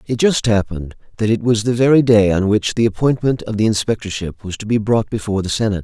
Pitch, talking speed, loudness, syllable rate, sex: 110 Hz, 235 wpm, -17 LUFS, 6.4 syllables/s, male